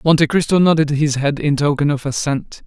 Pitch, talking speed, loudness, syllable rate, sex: 150 Hz, 200 wpm, -16 LUFS, 5.5 syllables/s, male